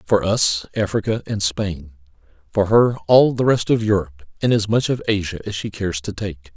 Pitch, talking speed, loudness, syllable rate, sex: 100 Hz, 200 wpm, -19 LUFS, 5.2 syllables/s, male